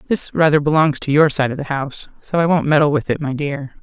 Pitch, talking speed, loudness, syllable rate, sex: 150 Hz, 265 wpm, -17 LUFS, 6.0 syllables/s, female